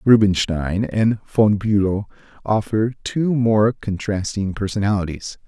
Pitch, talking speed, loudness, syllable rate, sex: 105 Hz, 100 wpm, -20 LUFS, 4.1 syllables/s, male